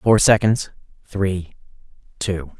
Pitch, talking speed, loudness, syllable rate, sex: 95 Hz, 95 wpm, -19 LUFS, 3.2 syllables/s, male